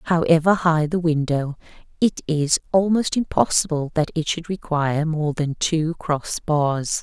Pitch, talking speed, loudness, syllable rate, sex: 160 Hz, 145 wpm, -21 LUFS, 4.2 syllables/s, female